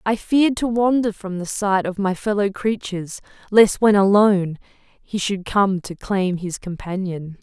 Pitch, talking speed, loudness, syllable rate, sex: 200 Hz, 170 wpm, -20 LUFS, 4.3 syllables/s, female